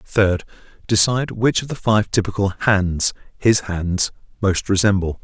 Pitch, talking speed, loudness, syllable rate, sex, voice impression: 100 Hz, 140 wpm, -19 LUFS, 4.3 syllables/s, male, masculine, adult-like, thick, tensed, powerful, clear, cool, intellectual, slightly mature, wild, lively, slightly modest